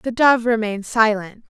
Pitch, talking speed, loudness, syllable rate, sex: 225 Hz, 150 wpm, -18 LUFS, 4.9 syllables/s, female